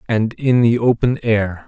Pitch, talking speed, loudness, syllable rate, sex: 115 Hz, 180 wpm, -16 LUFS, 4.0 syllables/s, male